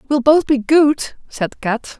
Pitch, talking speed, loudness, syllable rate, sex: 265 Hz, 180 wpm, -16 LUFS, 3.5 syllables/s, female